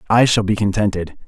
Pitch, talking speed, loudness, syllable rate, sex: 105 Hz, 190 wpm, -17 LUFS, 5.9 syllables/s, male